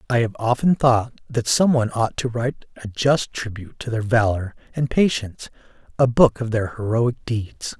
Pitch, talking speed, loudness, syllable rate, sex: 120 Hz, 185 wpm, -21 LUFS, 5.0 syllables/s, male